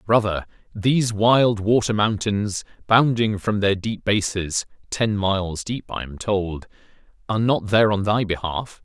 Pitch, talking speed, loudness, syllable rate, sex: 105 Hz, 150 wpm, -21 LUFS, 3.8 syllables/s, male